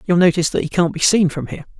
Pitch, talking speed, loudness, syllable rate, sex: 175 Hz, 300 wpm, -17 LUFS, 7.5 syllables/s, male